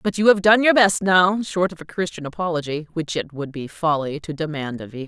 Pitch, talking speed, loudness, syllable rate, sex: 170 Hz, 235 wpm, -20 LUFS, 5.4 syllables/s, female